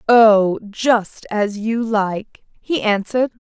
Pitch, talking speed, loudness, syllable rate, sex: 220 Hz, 120 wpm, -17 LUFS, 3.1 syllables/s, female